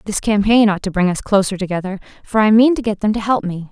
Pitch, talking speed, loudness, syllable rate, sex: 205 Hz, 275 wpm, -16 LUFS, 6.3 syllables/s, female